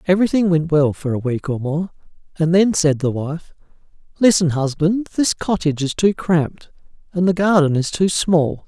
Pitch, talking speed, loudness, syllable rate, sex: 165 Hz, 180 wpm, -18 LUFS, 5.0 syllables/s, male